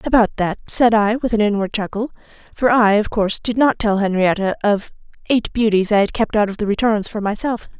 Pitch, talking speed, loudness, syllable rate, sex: 215 Hz, 215 wpm, -18 LUFS, 5.6 syllables/s, female